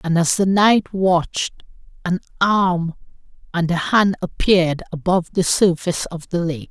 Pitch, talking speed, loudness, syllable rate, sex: 175 Hz, 150 wpm, -19 LUFS, 4.6 syllables/s, female